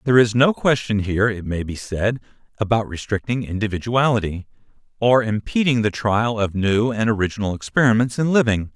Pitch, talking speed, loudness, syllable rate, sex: 110 Hz, 160 wpm, -20 LUFS, 5.4 syllables/s, male